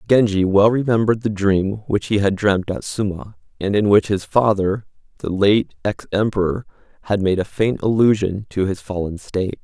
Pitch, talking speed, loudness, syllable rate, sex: 100 Hz, 180 wpm, -19 LUFS, 5.0 syllables/s, male